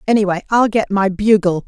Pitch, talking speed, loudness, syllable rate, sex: 200 Hz, 180 wpm, -15 LUFS, 5.6 syllables/s, female